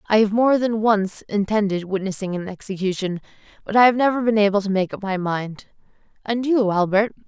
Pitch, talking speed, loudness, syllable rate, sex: 205 Hz, 190 wpm, -20 LUFS, 5.6 syllables/s, female